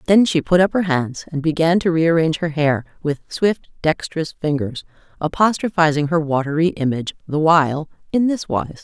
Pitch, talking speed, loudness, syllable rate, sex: 160 Hz, 170 wpm, -19 LUFS, 5.3 syllables/s, female